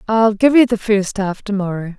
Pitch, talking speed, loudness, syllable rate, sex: 210 Hz, 240 wpm, -16 LUFS, 4.9 syllables/s, female